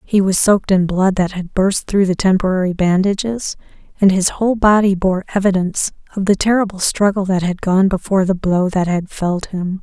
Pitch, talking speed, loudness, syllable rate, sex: 190 Hz, 195 wpm, -16 LUFS, 5.5 syllables/s, female